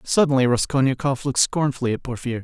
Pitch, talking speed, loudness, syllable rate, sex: 130 Hz, 150 wpm, -21 LUFS, 6.9 syllables/s, male